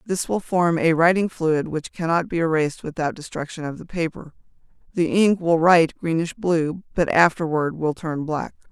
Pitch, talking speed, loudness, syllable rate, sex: 165 Hz, 180 wpm, -21 LUFS, 4.9 syllables/s, female